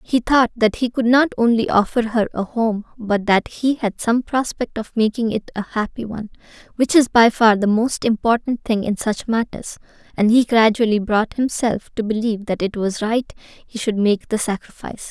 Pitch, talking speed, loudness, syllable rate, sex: 225 Hz, 200 wpm, -19 LUFS, 4.9 syllables/s, female